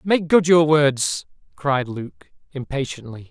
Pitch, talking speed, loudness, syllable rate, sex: 140 Hz, 125 wpm, -19 LUFS, 3.6 syllables/s, male